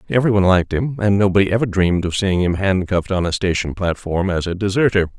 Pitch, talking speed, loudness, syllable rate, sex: 95 Hz, 210 wpm, -18 LUFS, 6.5 syllables/s, male